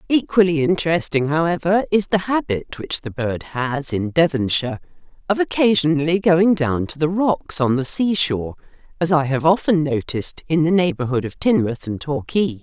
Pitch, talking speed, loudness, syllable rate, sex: 155 Hz, 160 wpm, -19 LUFS, 5.1 syllables/s, female